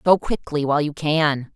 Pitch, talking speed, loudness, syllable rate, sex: 150 Hz, 190 wpm, -21 LUFS, 4.8 syllables/s, female